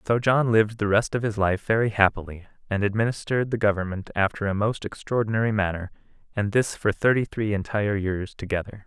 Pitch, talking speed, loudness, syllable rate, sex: 105 Hz, 185 wpm, -24 LUFS, 6.0 syllables/s, male